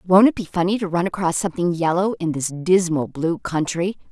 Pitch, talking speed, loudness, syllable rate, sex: 175 Hz, 205 wpm, -20 LUFS, 5.5 syllables/s, female